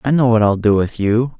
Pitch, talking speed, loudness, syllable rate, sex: 115 Hz, 300 wpm, -15 LUFS, 5.6 syllables/s, male